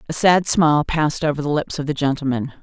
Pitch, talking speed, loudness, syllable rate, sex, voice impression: 150 Hz, 230 wpm, -19 LUFS, 6.4 syllables/s, female, slightly masculine, slightly feminine, very gender-neutral, adult-like, slightly middle-aged, slightly thin, tensed, slightly powerful, bright, hard, very clear, very fluent, cool, very intellectual, very refreshing, sincere, very calm, very friendly, reassuring, unique, slightly elegant, wild, slightly sweet, lively, slightly kind, strict, intense